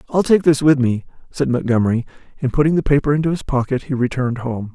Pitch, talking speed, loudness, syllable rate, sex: 135 Hz, 215 wpm, -18 LUFS, 6.5 syllables/s, male